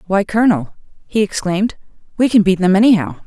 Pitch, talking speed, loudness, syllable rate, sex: 200 Hz, 165 wpm, -15 LUFS, 6.4 syllables/s, female